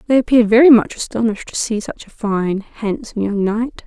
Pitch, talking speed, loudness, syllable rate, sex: 225 Hz, 200 wpm, -16 LUFS, 5.7 syllables/s, female